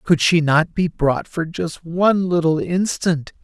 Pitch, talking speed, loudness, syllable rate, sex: 165 Hz, 175 wpm, -19 LUFS, 4.0 syllables/s, male